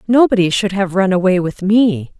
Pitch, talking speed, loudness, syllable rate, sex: 195 Hz, 190 wpm, -14 LUFS, 4.9 syllables/s, female